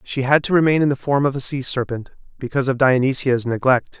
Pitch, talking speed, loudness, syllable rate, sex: 135 Hz, 225 wpm, -18 LUFS, 6.1 syllables/s, male